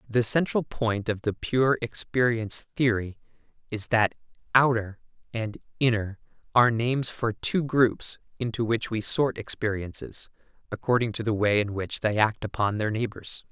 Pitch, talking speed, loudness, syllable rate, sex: 115 Hz, 150 wpm, -26 LUFS, 4.7 syllables/s, male